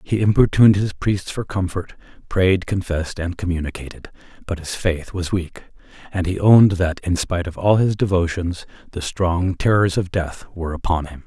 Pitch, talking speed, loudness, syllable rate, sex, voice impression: 90 Hz, 175 wpm, -20 LUFS, 5.2 syllables/s, male, very masculine, slightly old, very thick, very relaxed, slightly weak, dark, very soft, muffled, fluent, slightly raspy, very cool, intellectual, sincere, very calm, very mature, very friendly, very reassuring, unique, elegant, very wild, sweet, slightly lively, very kind, modest